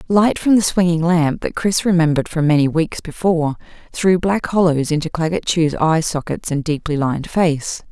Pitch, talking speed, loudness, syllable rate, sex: 165 Hz, 180 wpm, -17 LUFS, 5.1 syllables/s, female